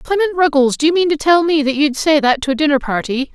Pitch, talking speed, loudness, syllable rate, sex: 295 Hz, 285 wpm, -15 LUFS, 6.2 syllables/s, female